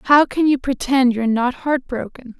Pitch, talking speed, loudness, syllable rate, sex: 260 Hz, 200 wpm, -18 LUFS, 4.7 syllables/s, female